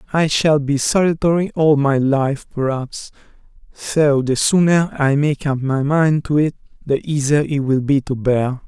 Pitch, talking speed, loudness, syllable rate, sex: 145 Hz, 175 wpm, -17 LUFS, 4.1 syllables/s, male